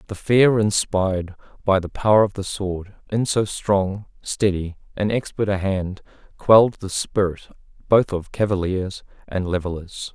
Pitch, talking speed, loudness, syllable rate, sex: 100 Hz, 150 wpm, -21 LUFS, 4.4 syllables/s, male